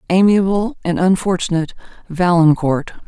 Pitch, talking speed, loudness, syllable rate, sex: 180 Hz, 80 wpm, -16 LUFS, 5.1 syllables/s, female